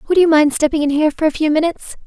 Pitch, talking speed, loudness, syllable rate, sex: 310 Hz, 290 wpm, -15 LUFS, 7.7 syllables/s, female